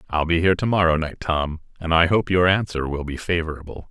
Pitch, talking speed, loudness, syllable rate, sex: 85 Hz, 230 wpm, -21 LUFS, 6.1 syllables/s, male